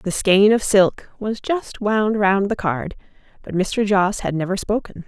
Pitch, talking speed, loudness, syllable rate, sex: 200 Hz, 190 wpm, -19 LUFS, 4.0 syllables/s, female